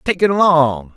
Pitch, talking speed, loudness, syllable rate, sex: 155 Hz, 190 wpm, -14 LUFS, 4.7 syllables/s, male